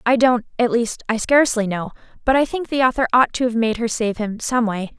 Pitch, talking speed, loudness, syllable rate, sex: 235 Hz, 230 wpm, -19 LUFS, 5.8 syllables/s, female